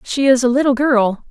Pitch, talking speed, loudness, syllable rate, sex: 255 Hz, 230 wpm, -15 LUFS, 5.0 syllables/s, female